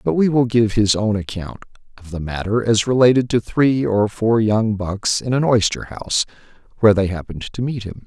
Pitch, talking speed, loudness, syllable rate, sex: 110 Hz, 210 wpm, -18 LUFS, 5.2 syllables/s, male